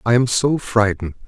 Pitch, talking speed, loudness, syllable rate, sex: 115 Hz, 190 wpm, -18 LUFS, 5.7 syllables/s, male